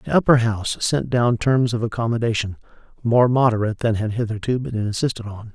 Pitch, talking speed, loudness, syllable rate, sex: 115 Hz, 175 wpm, -20 LUFS, 5.8 syllables/s, male